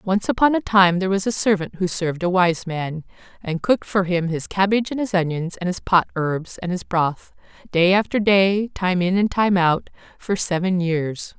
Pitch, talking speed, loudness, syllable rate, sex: 185 Hz, 210 wpm, -20 LUFS, 4.9 syllables/s, female